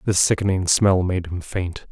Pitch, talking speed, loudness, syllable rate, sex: 95 Hz, 190 wpm, -20 LUFS, 4.5 syllables/s, male